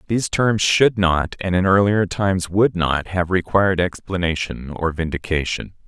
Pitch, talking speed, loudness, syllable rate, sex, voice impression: 90 Hz, 155 wpm, -19 LUFS, 4.7 syllables/s, male, masculine, adult-like, tensed, slightly powerful, clear, fluent, cool, intellectual, calm, slightly mature, wild, slightly lively, slightly modest